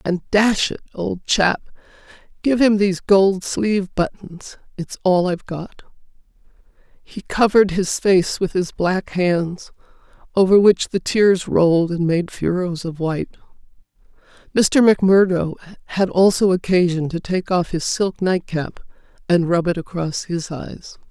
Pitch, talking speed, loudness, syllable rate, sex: 185 Hz, 140 wpm, -18 LUFS, 4.2 syllables/s, female